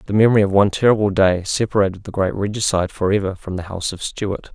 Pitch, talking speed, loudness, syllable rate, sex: 100 Hz, 225 wpm, -19 LUFS, 6.9 syllables/s, male